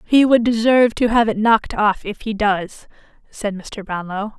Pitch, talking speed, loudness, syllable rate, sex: 215 Hz, 190 wpm, -18 LUFS, 4.7 syllables/s, female